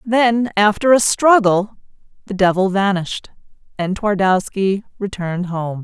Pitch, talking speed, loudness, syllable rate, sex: 200 Hz, 115 wpm, -17 LUFS, 4.4 syllables/s, female